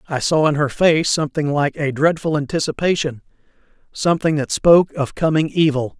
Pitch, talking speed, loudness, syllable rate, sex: 150 Hz, 150 wpm, -18 LUFS, 5.5 syllables/s, male